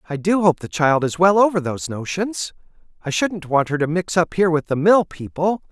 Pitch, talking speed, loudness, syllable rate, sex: 170 Hz, 230 wpm, -19 LUFS, 5.5 syllables/s, male